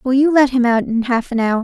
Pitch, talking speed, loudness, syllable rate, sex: 250 Hz, 330 wpm, -15 LUFS, 5.5 syllables/s, female